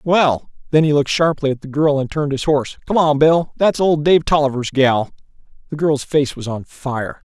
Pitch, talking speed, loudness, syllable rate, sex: 145 Hz, 190 wpm, -17 LUFS, 5.4 syllables/s, male